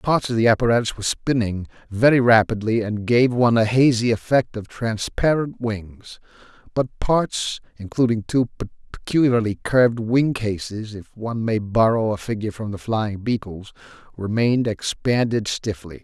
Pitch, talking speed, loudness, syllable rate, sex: 115 Hz, 135 wpm, -21 LUFS, 4.9 syllables/s, male